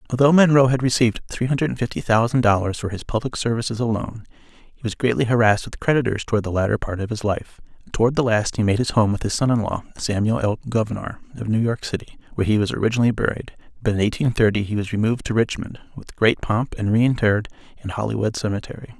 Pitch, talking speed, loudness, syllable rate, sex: 115 Hz, 220 wpm, -21 LUFS, 6.7 syllables/s, male